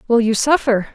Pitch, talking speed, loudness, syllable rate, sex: 235 Hz, 190 wpm, -16 LUFS, 5.3 syllables/s, female